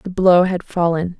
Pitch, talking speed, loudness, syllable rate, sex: 175 Hz, 200 wpm, -16 LUFS, 4.4 syllables/s, female